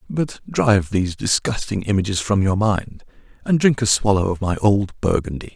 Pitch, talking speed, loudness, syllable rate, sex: 105 Hz, 175 wpm, -19 LUFS, 5.1 syllables/s, male